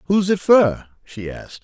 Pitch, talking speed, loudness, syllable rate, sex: 155 Hz, 185 wpm, -16 LUFS, 4.6 syllables/s, male